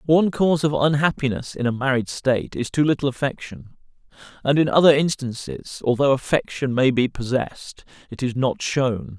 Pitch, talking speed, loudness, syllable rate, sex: 135 Hz, 165 wpm, -21 LUFS, 5.3 syllables/s, male